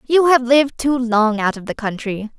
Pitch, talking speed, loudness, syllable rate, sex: 245 Hz, 225 wpm, -17 LUFS, 5.1 syllables/s, female